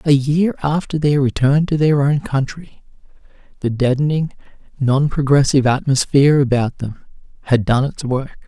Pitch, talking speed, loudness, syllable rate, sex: 140 Hz, 140 wpm, -17 LUFS, 4.8 syllables/s, male